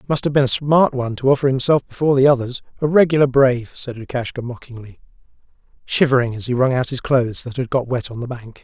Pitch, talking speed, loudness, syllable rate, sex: 130 Hz, 220 wpm, -18 LUFS, 6.5 syllables/s, male